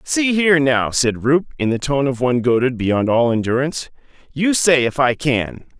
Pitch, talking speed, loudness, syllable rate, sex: 135 Hz, 195 wpm, -17 LUFS, 5.0 syllables/s, male